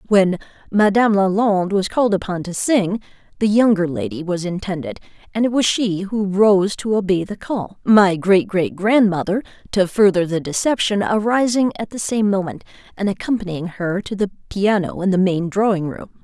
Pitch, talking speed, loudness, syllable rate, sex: 200 Hz, 175 wpm, -18 LUFS, 5.2 syllables/s, female